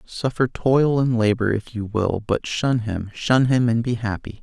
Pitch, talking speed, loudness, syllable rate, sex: 115 Hz, 205 wpm, -21 LUFS, 4.3 syllables/s, male